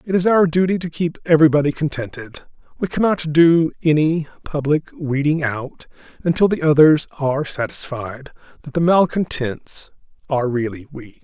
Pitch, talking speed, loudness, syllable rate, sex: 150 Hz, 140 wpm, -18 LUFS, 5.0 syllables/s, male